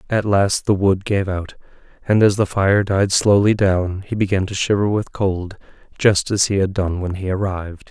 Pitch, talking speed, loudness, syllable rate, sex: 95 Hz, 205 wpm, -18 LUFS, 4.7 syllables/s, male